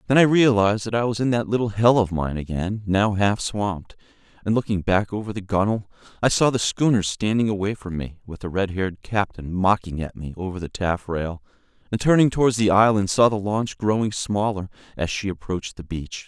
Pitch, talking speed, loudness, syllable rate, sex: 100 Hz, 205 wpm, -22 LUFS, 5.6 syllables/s, male